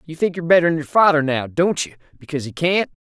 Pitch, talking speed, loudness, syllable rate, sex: 155 Hz, 235 wpm, -19 LUFS, 6.6 syllables/s, male